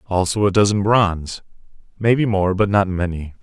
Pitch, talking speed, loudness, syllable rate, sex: 100 Hz, 160 wpm, -18 LUFS, 4.9 syllables/s, male